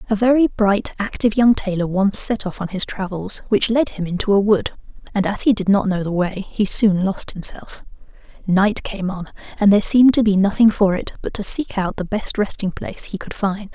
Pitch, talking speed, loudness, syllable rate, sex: 200 Hz, 225 wpm, -18 LUFS, 5.3 syllables/s, female